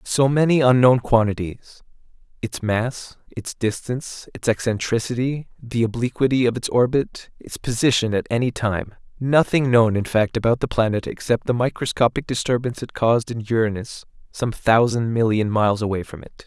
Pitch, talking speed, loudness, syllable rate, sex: 120 Hz, 150 wpm, -20 LUFS, 5.1 syllables/s, male